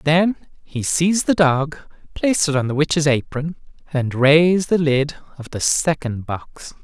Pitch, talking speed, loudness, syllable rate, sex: 150 Hz, 165 wpm, -19 LUFS, 4.3 syllables/s, male